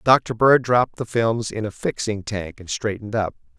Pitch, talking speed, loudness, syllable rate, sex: 110 Hz, 200 wpm, -21 LUFS, 4.9 syllables/s, male